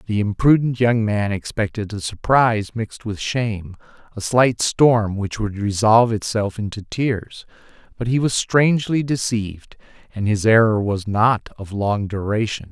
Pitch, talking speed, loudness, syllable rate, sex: 110 Hz, 145 wpm, -19 LUFS, 4.6 syllables/s, male